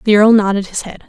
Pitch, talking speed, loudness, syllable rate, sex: 210 Hz, 280 wpm, -13 LUFS, 6.4 syllables/s, female